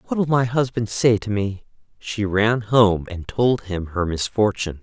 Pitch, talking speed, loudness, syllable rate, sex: 105 Hz, 185 wpm, -21 LUFS, 4.3 syllables/s, male